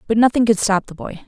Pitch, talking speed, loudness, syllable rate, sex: 210 Hz, 280 wpm, -17 LUFS, 6.3 syllables/s, female